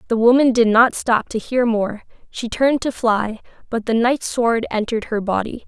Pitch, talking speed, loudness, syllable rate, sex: 230 Hz, 200 wpm, -18 LUFS, 4.9 syllables/s, female